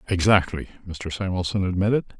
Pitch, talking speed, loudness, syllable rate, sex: 95 Hz, 110 wpm, -23 LUFS, 6.1 syllables/s, male